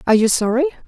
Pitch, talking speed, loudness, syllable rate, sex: 250 Hz, 205 wpm, -17 LUFS, 8.8 syllables/s, female